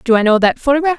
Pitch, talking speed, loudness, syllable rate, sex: 260 Hz, 305 wpm, -13 LUFS, 7.9 syllables/s, female